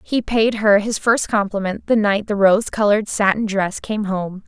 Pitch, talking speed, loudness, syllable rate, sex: 205 Hz, 200 wpm, -18 LUFS, 4.6 syllables/s, female